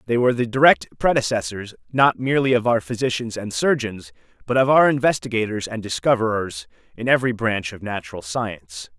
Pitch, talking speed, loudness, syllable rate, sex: 110 Hz, 160 wpm, -20 LUFS, 5.8 syllables/s, male